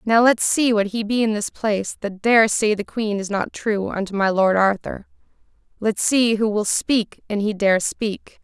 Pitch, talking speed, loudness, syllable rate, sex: 210 Hz, 215 wpm, -20 LUFS, 4.4 syllables/s, female